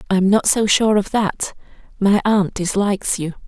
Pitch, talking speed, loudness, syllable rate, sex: 200 Hz, 155 wpm, -18 LUFS, 4.4 syllables/s, female